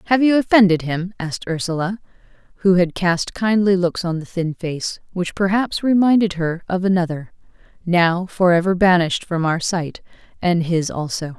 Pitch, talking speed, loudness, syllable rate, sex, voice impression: 180 Hz, 160 wpm, -19 LUFS, 4.9 syllables/s, female, very feminine, very adult-like, slightly thin, tensed, slightly weak, slightly dark, soft, clear, fluent, slightly raspy, cute, intellectual, very refreshing, sincere, very calm, friendly, reassuring, unique, very elegant, wild, slightly sweet, lively, kind, slightly modest